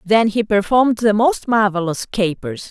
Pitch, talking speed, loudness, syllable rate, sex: 210 Hz, 155 wpm, -17 LUFS, 4.6 syllables/s, female